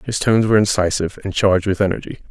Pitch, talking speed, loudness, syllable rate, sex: 100 Hz, 210 wpm, -17 LUFS, 7.7 syllables/s, male